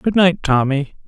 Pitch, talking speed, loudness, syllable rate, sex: 155 Hz, 165 wpm, -17 LUFS, 4.4 syllables/s, male